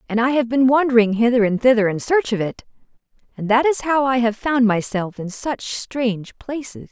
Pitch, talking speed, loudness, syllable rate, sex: 240 Hz, 210 wpm, -19 LUFS, 5.1 syllables/s, female